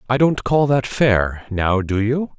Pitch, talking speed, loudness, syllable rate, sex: 120 Hz, 200 wpm, -18 LUFS, 3.7 syllables/s, male